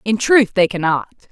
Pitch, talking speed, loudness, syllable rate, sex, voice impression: 205 Hz, 180 wpm, -16 LUFS, 4.6 syllables/s, female, feminine, adult-like, tensed, powerful, clear, fluent, intellectual, slightly elegant, lively, slightly strict, sharp